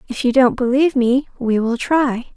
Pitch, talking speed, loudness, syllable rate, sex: 255 Hz, 205 wpm, -17 LUFS, 5.0 syllables/s, female